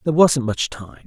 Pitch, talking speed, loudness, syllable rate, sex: 135 Hz, 225 wpm, -19 LUFS, 5.3 syllables/s, male